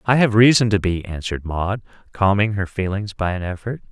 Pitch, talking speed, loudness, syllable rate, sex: 100 Hz, 200 wpm, -19 LUFS, 5.6 syllables/s, male